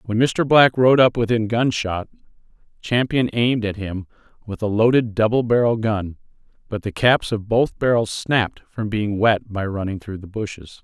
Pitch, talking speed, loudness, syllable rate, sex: 110 Hz, 175 wpm, -20 LUFS, 4.7 syllables/s, male